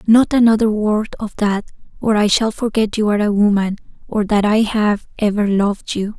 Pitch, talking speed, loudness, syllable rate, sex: 210 Hz, 195 wpm, -17 LUFS, 5.2 syllables/s, female